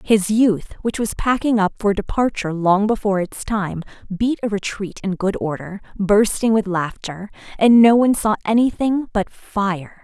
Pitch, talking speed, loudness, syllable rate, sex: 205 Hz, 165 wpm, -19 LUFS, 4.6 syllables/s, female